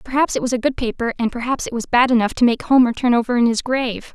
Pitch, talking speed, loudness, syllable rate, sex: 240 Hz, 290 wpm, -18 LUFS, 6.7 syllables/s, female